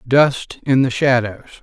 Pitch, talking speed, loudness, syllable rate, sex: 130 Hz, 150 wpm, -17 LUFS, 3.9 syllables/s, male